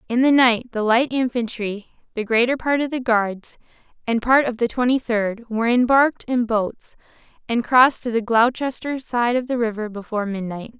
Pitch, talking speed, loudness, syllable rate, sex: 235 Hz, 185 wpm, -20 LUFS, 5.1 syllables/s, female